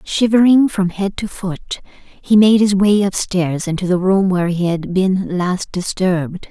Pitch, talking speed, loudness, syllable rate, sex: 190 Hz, 175 wpm, -16 LUFS, 4.1 syllables/s, female